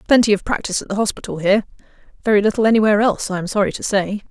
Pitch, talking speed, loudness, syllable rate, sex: 205 Hz, 210 wpm, -18 LUFS, 8.2 syllables/s, female